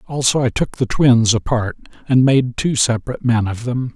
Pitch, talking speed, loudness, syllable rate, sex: 120 Hz, 195 wpm, -17 LUFS, 5.1 syllables/s, male